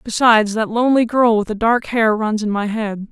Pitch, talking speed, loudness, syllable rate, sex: 220 Hz, 230 wpm, -16 LUFS, 5.3 syllables/s, female